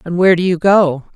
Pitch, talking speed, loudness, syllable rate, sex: 175 Hz, 260 wpm, -13 LUFS, 6.0 syllables/s, female